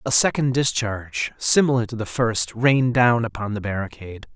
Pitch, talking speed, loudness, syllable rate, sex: 115 Hz, 165 wpm, -21 LUFS, 5.3 syllables/s, male